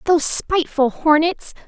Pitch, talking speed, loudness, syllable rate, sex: 300 Hz, 105 wpm, -17 LUFS, 4.9 syllables/s, female